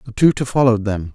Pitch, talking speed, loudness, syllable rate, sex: 115 Hz, 210 wpm, -17 LUFS, 6.9 syllables/s, male